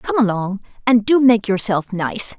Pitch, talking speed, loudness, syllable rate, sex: 220 Hz, 175 wpm, -17 LUFS, 4.3 syllables/s, female